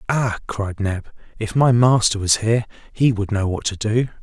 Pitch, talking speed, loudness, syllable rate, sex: 110 Hz, 200 wpm, -19 LUFS, 4.9 syllables/s, male